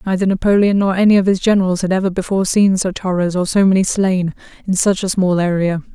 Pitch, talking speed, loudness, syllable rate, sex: 190 Hz, 220 wpm, -15 LUFS, 6.3 syllables/s, female